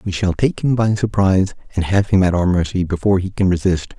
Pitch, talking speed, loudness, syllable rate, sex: 95 Hz, 240 wpm, -17 LUFS, 6.0 syllables/s, male